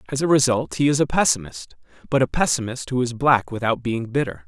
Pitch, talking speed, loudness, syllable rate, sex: 125 Hz, 215 wpm, -21 LUFS, 5.8 syllables/s, male